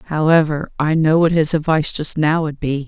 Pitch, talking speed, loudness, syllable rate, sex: 155 Hz, 210 wpm, -16 LUFS, 5.1 syllables/s, female